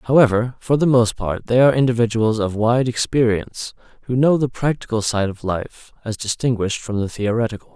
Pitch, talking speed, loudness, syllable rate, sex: 115 Hz, 180 wpm, -19 LUFS, 5.6 syllables/s, male